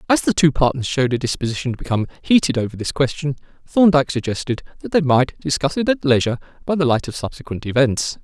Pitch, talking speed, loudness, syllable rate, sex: 140 Hz, 205 wpm, -19 LUFS, 6.7 syllables/s, male